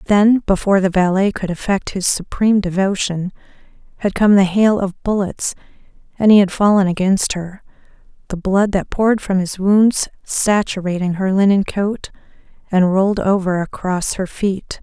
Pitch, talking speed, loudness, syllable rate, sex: 195 Hz, 155 wpm, -16 LUFS, 4.8 syllables/s, female